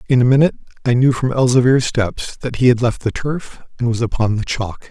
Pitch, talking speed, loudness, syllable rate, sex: 125 Hz, 230 wpm, -17 LUFS, 5.7 syllables/s, male